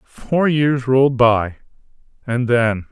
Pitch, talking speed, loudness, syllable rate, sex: 125 Hz, 105 wpm, -17 LUFS, 3.2 syllables/s, male